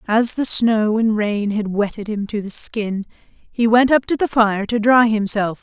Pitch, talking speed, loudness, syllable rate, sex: 220 Hz, 215 wpm, -18 LUFS, 4.2 syllables/s, female